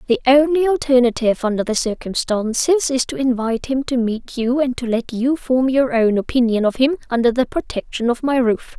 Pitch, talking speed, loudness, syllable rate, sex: 250 Hz, 190 wpm, -18 LUFS, 5.4 syllables/s, female